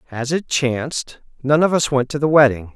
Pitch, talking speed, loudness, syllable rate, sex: 135 Hz, 220 wpm, -18 LUFS, 5.2 syllables/s, male